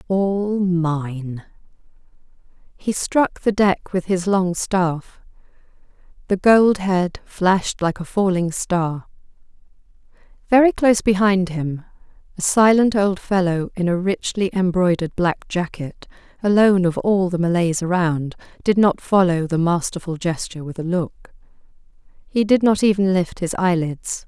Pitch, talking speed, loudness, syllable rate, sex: 185 Hz, 135 wpm, -19 LUFS, 4.2 syllables/s, female